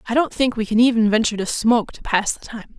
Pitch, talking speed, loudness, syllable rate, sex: 225 Hz, 280 wpm, -19 LUFS, 6.5 syllables/s, female